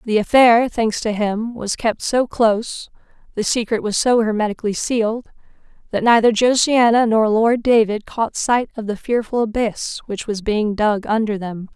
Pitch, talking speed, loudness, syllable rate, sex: 220 Hz, 170 wpm, -18 LUFS, 4.6 syllables/s, female